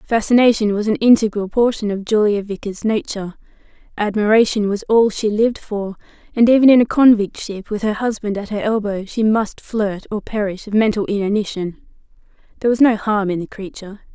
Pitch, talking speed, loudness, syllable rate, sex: 210 Hz, 180 wpm, -17 LUFS, 5.6 syllables/s, female